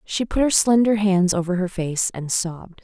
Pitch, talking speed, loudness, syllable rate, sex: 195 Hz, 210 wpm, -20 LUFS, 4.8 syllables/s, female